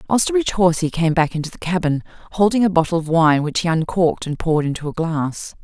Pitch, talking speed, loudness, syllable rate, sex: 170 Hz, 215 wpm, -19 LUFS, 6.3 syllables/s, female